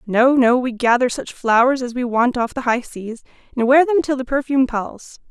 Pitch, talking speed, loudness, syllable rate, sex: 250 Hz, 225 wpm, -17 LUFS, 5.0 syllables/s, female